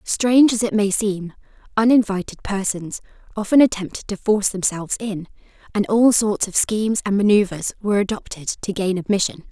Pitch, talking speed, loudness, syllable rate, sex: 205 Hz, 160 wpm, -19 LUFS, 5.6 syllables/s, female